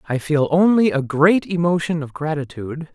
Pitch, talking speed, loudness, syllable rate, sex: 160 Hz, 165 wpm, -18 LUFS, 5.1 syllables/s, male